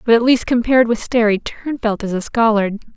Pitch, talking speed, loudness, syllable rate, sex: 225 Hz, 205 wpm, -16 LUFS, 5.5 syllables/s, female